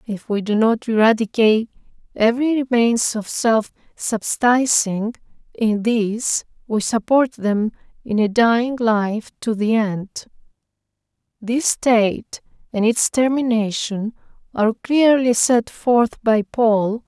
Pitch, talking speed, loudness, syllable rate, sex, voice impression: 225 Hz, 115 wpm, -18 LUFS, 3.8 syllables/s, female, very gender-neutral, adult-like, thin, slightly relaxed, slightly weak, slightly dark, soft, clear, fluent, very cute, very intellectual, refreshing, very sincere, very calm, very friendly, very reassuring, very unique, very elegant, very sweet, slightly lively, very kind, modest, light